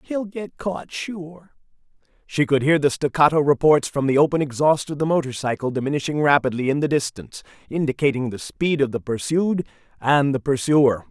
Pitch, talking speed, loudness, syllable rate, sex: 145 Hz, 170 wpm, -21 LUFS, 5.3 syllables/s, male